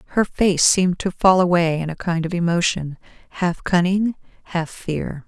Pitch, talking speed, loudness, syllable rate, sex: 175 Hz, 170 wpm, -20 LUFS, 4.7 syllables/s, female